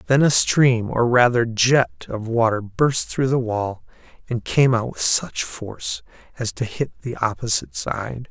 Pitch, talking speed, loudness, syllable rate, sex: 115 Hz, 175 wpm, -20 LUFS, 4.1 syllables/s, male